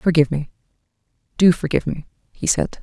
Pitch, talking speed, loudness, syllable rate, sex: 150 Hz, 125 wpm, -19 LUFS, 6.6 syllables/s, female